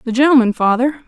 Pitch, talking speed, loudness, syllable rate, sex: 255 Hz, 165 wpm, -14 LUFS, 6.5 syllables/s, female